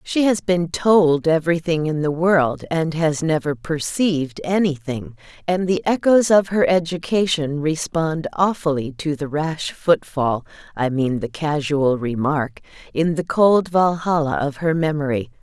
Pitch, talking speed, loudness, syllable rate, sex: 160 Hz, 135 wpm, -20 LUFS, 4.2 syllables/s, female